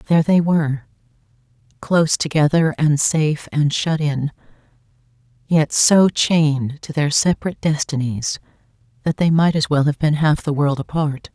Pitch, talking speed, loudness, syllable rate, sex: 145 Hz, 150 wpm, -18 LUFS, 4.8 syllables/s, female